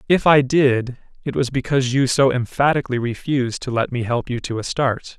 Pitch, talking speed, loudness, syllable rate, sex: 130 Hz, 210 wpm, -19 LUFS, 5.5 syllables/s, male